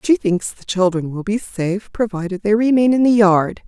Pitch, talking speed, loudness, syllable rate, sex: 205 Hz, 215 wpm, -17 LUFS, 5.1 syllables/s, female